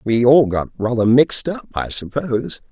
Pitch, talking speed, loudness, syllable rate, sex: 125 Hz, 175 wpm, -17 LUFS, 4.9 syllables/s, male